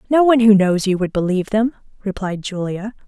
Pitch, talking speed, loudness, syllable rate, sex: 205 Hz, 195 wpm, -17 LUFS, 6.0 syllables/s, female